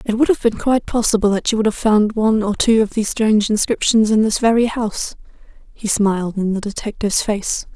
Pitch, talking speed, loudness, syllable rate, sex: 215 Hz, 215 wpm, -17 LUFS, 6.0 syllables/s, female